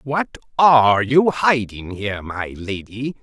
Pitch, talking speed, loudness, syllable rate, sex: 120 Hz, 130 wpm, -18 LUFS, 3.8 syllables/s, male